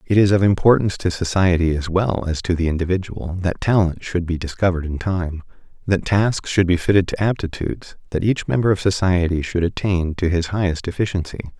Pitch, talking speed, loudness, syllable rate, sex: 90 Hz, 190 wpm, -20 LUFS, 5.7 syllables/s, male